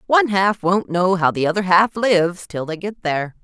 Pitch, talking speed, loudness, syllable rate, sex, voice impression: 185 Hz, 225 wpm, -18 LUFS, 5.3 syllables/s, female, feminine, middle-aged, tensed, powerful, hard, clear, intellectual, lively, slightly strict, intense, sharp